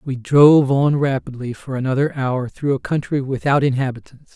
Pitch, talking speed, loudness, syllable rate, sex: 135 Hz, 165 wpm, -18 LUFS, 5.2 syllables/s, male